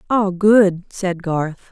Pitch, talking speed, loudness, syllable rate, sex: 185 Hz, 140 wpm, -17 LUFS, 2.7 syllables/s, female